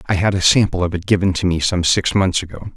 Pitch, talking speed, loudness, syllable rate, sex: 95 Hz, 285 wpm, -17 LUFS, 6.3 syllables/s, male